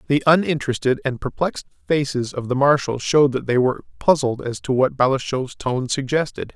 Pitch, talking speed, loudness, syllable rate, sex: 135 Hz, 175 wpm, -20 LUFS, 5.7 syllables/s, male